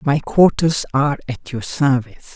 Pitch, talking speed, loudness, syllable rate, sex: 140 Hz, 155 wpm, -18 LUFS, 4.9 syllables/s, female